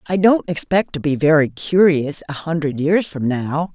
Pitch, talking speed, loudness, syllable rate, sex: 160 Hz, 190 wpm, -18 LUFS, 4.5 syllables/s, female